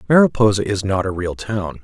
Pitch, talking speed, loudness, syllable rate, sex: 100 Hz, 195 wpm, -18 LUFS, 5.5 syllables/s, male